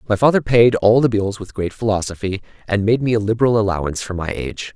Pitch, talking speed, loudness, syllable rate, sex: 105 Hz, 225 wpm, -18 LUFS, 6.5 syllables/s, male